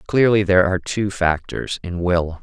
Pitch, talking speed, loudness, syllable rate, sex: 95 Hz, 175 wpm, -19 LUFS, 4.9 syllables/s, male